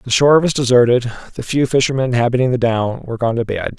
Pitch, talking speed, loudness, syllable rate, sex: 125 Hz, 220 wpm, -16 LUFS, 6.7 syllables/s, male